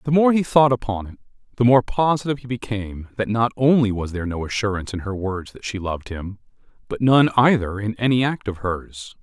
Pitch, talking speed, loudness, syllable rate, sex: 110 Hz, 215 wpm, -21 LUFS, 5.9 syllables/s, male